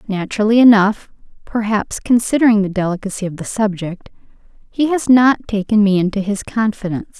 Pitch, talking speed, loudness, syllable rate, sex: 210 Hz, 140 wpm, -16 LUFS, 5.7 syllables/s, female